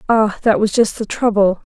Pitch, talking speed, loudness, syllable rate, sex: 210 Hz, 210 wpm, -16 LUFS, 4.9 syllables/s, female